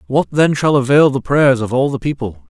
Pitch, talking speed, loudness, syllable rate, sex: 130 Hz, 230 wpm, -14 LUFS, 5.5 syllables/s, male